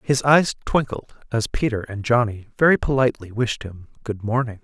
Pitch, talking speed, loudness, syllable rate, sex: 120 Hz, 170 wpm, -21 LUFS, 5.2 syllables/s, male